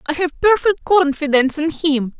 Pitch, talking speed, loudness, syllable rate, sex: 315 Hz, 165 wpm, -16 LUFS, 5.5 syllables/s, female